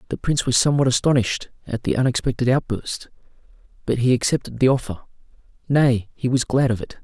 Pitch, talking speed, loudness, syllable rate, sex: 125 Hz, 170 wpm, -21 LUFS, 6.4 syllables/s, male